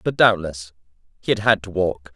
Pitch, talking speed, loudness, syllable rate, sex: 95 Hz, 195 wpm, -20 LUFS, 5.1 syllables/s, male